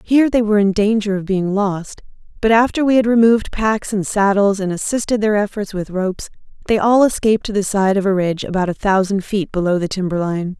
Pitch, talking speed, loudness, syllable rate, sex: 205 Hz, 215 wpm, -17 LUFS, 6.0 syllables/s, female